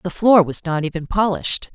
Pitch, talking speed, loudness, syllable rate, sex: 180 Hz, 205 wpm, -18 LUFS, 5.7 syllables/s, female